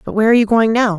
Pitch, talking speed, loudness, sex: 220 Hz, 365 wpm, -13 LUFS, female